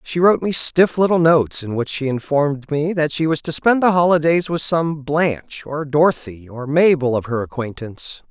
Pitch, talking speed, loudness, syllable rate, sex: 150 Hz, 200 wpm, -18 LUFS, 5.2 syllables/s, male